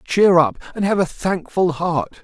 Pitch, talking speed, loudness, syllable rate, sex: 175 Hz, 190 wpm, -18 LUFS, 4.4 syllables/s, male